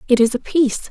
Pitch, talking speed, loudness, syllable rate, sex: 255 Hz, 265 wpm, -17 LUFS, 6.9 syllables/s, female